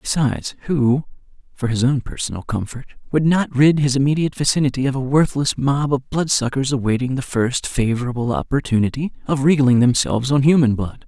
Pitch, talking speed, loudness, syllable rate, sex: 135 Hz, 170 wpm, -19 LUFS, 5.3 syllables/s, male